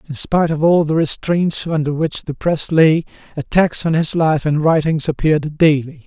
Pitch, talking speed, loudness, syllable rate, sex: 155 Hz, 190 wpm, -16 LUFS, 4.8 syllables/s, male